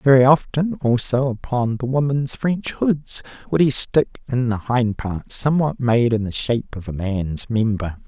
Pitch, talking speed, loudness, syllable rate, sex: 125 Hz, 180 wpm, -20 LUFS, 4.3 syllables/s, male